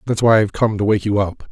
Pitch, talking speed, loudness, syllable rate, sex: 105 Hz, 315 wpm, -17 LUFS, 6.9 syllables/s, male